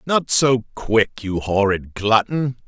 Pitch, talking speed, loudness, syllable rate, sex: 115 Hz, 135 wpm, -19 LUFS, 3.4 syllables/s, male